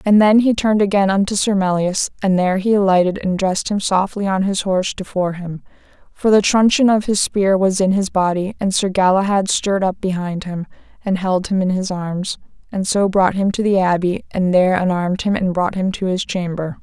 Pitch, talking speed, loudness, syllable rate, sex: 190 Hz, 220 wpm, -17 LUFS, 5.4 syllables/s, female